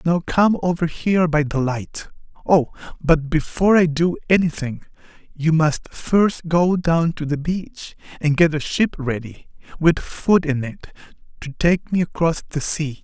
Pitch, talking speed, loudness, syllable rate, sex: 160 Hz, 160 wpm, -19 LUFS, 4.2 syllables/s, male